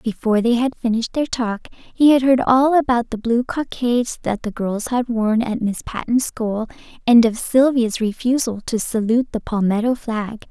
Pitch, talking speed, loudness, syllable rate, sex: 235 Hz, 185 wpm, -19 LUFS, 4.9 syllables/s, female